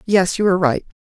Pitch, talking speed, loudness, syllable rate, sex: 195 Hz, 235 wpm, -17 LUFS, 6.3 syllables/s, female